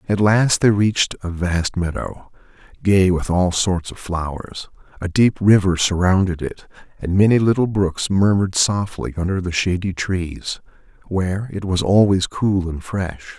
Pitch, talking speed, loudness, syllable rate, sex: 95 Hz, 155 wpm, -19 LUFS, 4.4 syllables/s, male